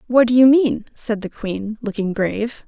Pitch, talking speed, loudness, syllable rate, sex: 225 Hz, 200 wpm, -18 LUFS, 4.6 syllables/s, female